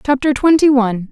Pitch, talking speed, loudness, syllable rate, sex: 265 Hz, 160 wpm, -13 LUFS, 6.1 syllables/s, female